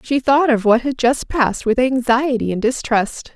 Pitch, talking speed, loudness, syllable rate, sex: 245 Hz, 195 wpm, -17 LUFS, 4.6 syllables/s, female